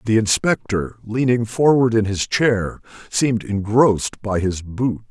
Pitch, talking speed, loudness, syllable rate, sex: 110 Hz, 140 wpm, -19 LUFS, 4.2 syllables/s, male